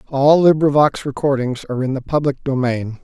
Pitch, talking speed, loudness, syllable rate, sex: 135 Hz, 160 wpm, -17 LUFS, 5.4 syllables/s, male